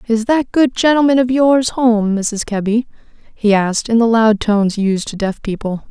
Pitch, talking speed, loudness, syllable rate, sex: 225 Hz, 195 wpm, -15 LUFS, 4.7 syllables/s, female